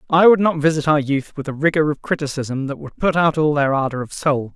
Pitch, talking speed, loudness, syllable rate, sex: 150 Hz, 265 wpm, -18 LUFS, 5.8 syllables/s, male